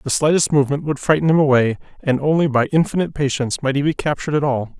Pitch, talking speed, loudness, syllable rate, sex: 140 Hz, 225 wpm, -18 LUFS, 7.1 syllables/s, male